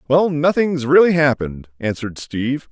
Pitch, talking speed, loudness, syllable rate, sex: 140 Hz, 135 wpm, -18 LUFS, 5.4 syllables/s, male